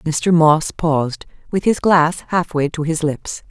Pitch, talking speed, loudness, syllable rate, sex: 160 Hz, 170 wpm, -17 LUFS, 3.9 syllables/s, female